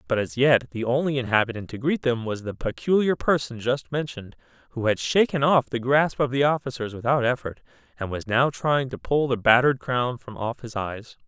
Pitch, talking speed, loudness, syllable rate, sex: 125 Hz, 210 wpm, -24 LUFS, 5.4 syllables/s, male